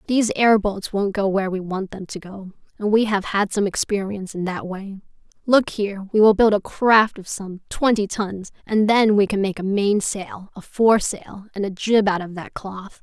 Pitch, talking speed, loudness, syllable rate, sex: 200 Hz, 215 wpm, -20 LUFS, 4.9 syllables/s, female